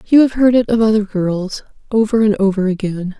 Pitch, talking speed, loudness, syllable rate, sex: 210 Hz, 205 wpm, -15 LUFS, 5.4 syllables/s, female